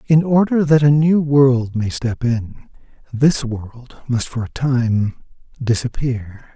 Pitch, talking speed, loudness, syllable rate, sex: 130 Hz, 145 wpm, -17 LUFS, 3.5 syllables/s, male